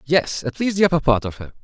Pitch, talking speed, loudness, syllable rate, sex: 150 Hz, 295 wpm, -19 LUFS, 6.4 syllables/s, male